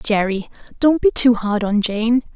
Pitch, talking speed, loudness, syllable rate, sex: 225 Hz, 180 wpm, -17 LUFS, 4.2 syllables/s, female